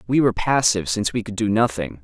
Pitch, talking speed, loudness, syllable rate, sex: 105 Hz, 235 wpm, -20 LUFS, 7.0 syllables/s, male